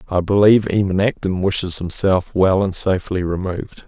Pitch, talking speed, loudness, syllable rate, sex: 95 Hz, 155 wpm, -17 LUFS, 5.5 syllables/s, male